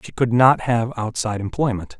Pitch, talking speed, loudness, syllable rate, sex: 115 Hz, 180 wpm, -19 LUFS, 5.4 syllables/s, male